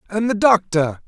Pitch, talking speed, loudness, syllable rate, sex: 195 Hz, 170 wpm, -17 LUFS, 4.7 syllables/s, male